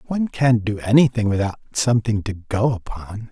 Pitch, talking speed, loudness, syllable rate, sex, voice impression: 115 Hz, 165 wpm, -20 LUFS, 5.6 syllables/s, male, masculine, very adult-like, slightly muffled, slightly sincere, friendly, kind